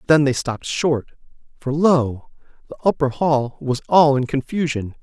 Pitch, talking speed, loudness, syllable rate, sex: 140 Hz, 155 wpm, -19 LUFS, 4.6 syllables/s, male